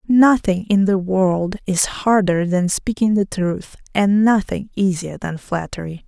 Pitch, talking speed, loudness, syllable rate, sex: 195 Hz, 150 wpm, -18 LUFS, 3.9 syllables/s, female